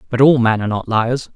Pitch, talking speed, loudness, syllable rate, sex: 120 Hz, 265 wpm, -16 LUFS, 6.1 syllables/s, male